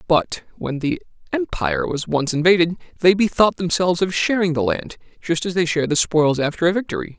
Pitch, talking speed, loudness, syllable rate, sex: 170 Hz, 185 wpm, -19 LUFS, 5.5 syllables/s, male